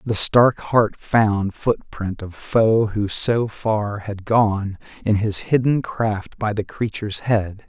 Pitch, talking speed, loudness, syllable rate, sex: 105 Hz, 155 wpm, -20 LUFS, 3.3 syllables/s, male